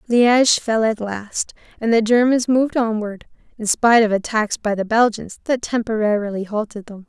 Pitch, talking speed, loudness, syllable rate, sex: 220 Hz, 170 wpm, -18 LUFS, 5.1 syllables/s, female